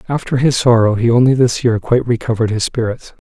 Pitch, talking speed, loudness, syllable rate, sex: 120 Hz, 200 wpm, -14 LUFS, 6.4 syllables/s, male